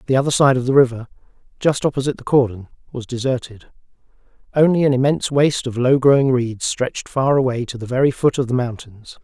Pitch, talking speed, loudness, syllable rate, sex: 130 Hz, 195 wpm, -18 LUFS, 6.3 syllables/s, male